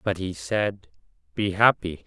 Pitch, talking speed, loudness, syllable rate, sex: 90 Hz, 145 wpm, -24 LUFS, 4.0 syllables/s, male